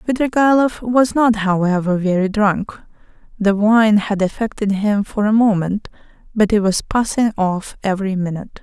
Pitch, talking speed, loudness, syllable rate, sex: 210 Hz, 145 wpm, -17 LUFS, 4.7 syllables/s, female